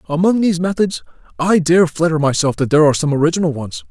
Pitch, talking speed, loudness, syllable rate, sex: 160 Hz, 200 wpm, -15 LUFS, 6.9 syllables/s, male